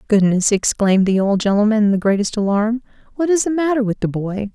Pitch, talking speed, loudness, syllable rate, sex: 215 Hz, 210 wpm, -17 LUFS, 5.9 syllables/s, female